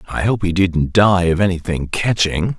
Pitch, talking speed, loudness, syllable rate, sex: 90 Hz, 185 wpm, -17 LUFS, 4.8 syllables/s, male